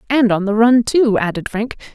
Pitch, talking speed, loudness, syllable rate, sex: 225 Hz, 215 wpm, -15 LUFS, 5.0 syllables/s, female